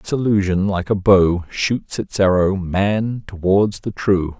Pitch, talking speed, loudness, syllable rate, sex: 95 Hz, 150 wpm, -18 LUFS, 3.7 syllables/s, male